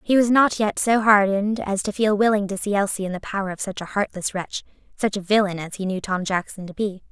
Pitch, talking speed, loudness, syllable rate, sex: 200 Hz, 260 wpm, -22 LUFS, 5.9 syllables/s, female